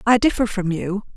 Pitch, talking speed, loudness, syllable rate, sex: 210 Hz, 205 wpm, -21 LUFS, 5.2 syllables/s, female